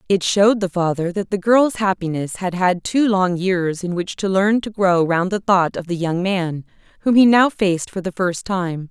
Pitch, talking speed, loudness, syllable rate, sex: 190 Hz, 230 wpm, -18 LUFS, 4.7 syllables/s, female